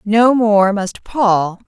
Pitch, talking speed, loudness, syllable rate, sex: 210 Hz, 145 wpm, -14 LUFS, 2.6 syllables/s, female